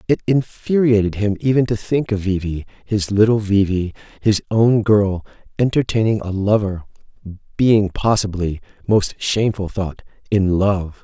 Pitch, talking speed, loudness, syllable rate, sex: 105 Hz, 130 wpm, -18 LUFS, 4.5 syllables/s, male